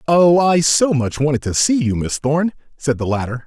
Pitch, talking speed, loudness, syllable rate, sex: 145 Hz, 225 wpm, -17 LUFS, 4.9 syllables/s, male